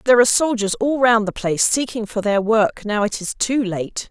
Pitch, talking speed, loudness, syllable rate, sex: 220 Hz, 235 wpm, -18 LUFS, 5.4 syllables/s, female